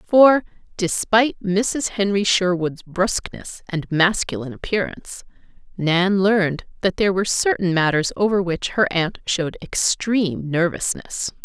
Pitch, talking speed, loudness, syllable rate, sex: 185 Hz, 120 wpm, -20 LUFS, 4.5 syllables/s, female